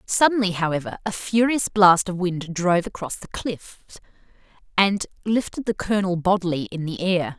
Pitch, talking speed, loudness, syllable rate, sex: 185 Hz, 155 wpm, -22 LUFS, 5.1 syllables/s, female